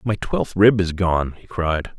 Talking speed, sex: 210 wpm, male